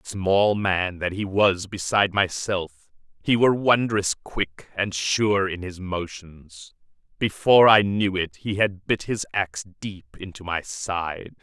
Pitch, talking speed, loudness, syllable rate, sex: 95 Hz, 150 wpm, -22 LUFS, 3.7 syllables/s, male